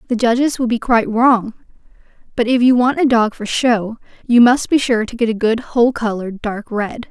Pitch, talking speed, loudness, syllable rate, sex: 235 Hz, 220 wpm, -16 LUFS, 5.3 syllables/s, female